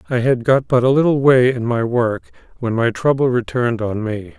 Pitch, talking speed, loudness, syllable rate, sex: 125 Hz, 220 wpm, -17 LUFS, 5.3 syllables/s, male